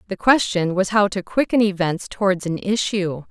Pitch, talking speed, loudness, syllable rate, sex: 195 Hz, 180 wpm, -20 LUFS, 4.9 syllables/s, female